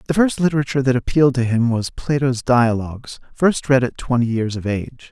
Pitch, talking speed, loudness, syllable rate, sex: 125 Hz, 200 wpm, -18 LUFS, 5.8 syllables/s, male